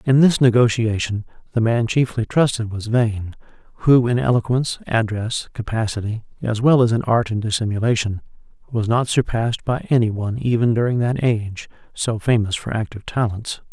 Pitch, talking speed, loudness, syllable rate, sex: 115 Hz, 155 wpm, -20 LUFS, 5.4 syllables/s, male